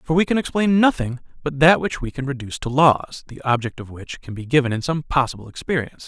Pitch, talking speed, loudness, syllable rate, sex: 140 Hz, 235 wpm, -20 LUFS, 6.1 syllables/s, male